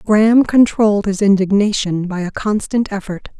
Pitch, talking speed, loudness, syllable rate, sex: 205 Hz, 140 wpm, -15 LUFS, 5.1 syllables/s, female